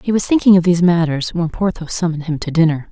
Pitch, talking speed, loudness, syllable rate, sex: 170 Hz, 245 wpm, -16 LUFS, 6.8 syllables/s, female